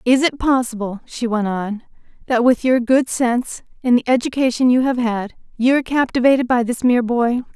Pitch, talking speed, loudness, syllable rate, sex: 245 Hz, 190 wpm, -18 LUFS, 5.4 syllables/s, female